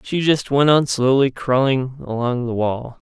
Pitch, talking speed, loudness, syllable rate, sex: 130 Hz, 175 wpm, -18 LUFS, 4.2 syllables/s, male